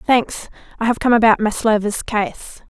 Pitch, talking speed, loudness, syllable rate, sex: 225 Hz, 155 wpm, -17 LUFS, 4.4 syllables/s, female